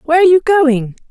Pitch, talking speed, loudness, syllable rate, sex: 310 Hz, 215 wpm, -12 LUFS, 6.8 syllables/s, female